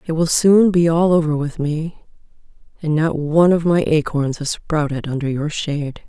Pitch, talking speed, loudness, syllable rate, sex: 160 Hz, 190 wpm, -18 LUFS, 4.9 syllables/s, female